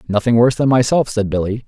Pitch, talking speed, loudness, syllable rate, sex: 115 Hz, 215 wpm, -15 LUFS, 6.6 syllables/s, male